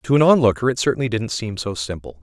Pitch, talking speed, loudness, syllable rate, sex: 115 Hz, 240 wpm, -19 LUFS, 6.6 syllables/s, male